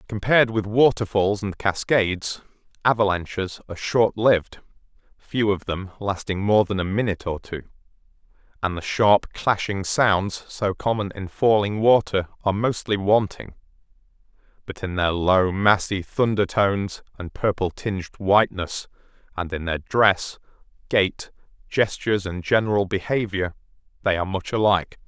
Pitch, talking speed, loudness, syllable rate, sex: 100 Hz, 130 wpm, -22 LUFS, 4.8 syllables/s, male